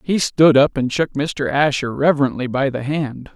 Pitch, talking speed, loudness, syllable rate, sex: 140 Hz, 195 wpm, -18 LUFS, 4.7 syllables/s, male